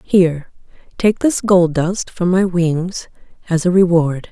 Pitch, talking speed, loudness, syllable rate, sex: 175 Hz, 155 wpm, -16 LUFS, 3.9 syllables/s, female